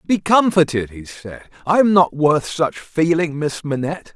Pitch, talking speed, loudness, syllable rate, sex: 155 Hz, 175 wpm, -17 LUFS, 4.4 syllables/s, male